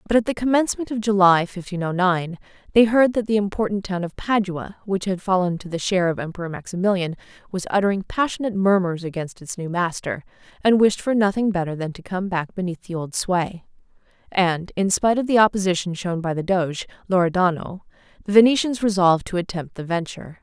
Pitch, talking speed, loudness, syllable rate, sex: 190 Hz, 190 wpm, -21 LUFS, 6.0 syllables/s, female